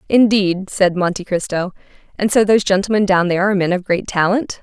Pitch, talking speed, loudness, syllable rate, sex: 190 Hz, 195 wpm, -16 LUFS, 6.0 syllables/s, female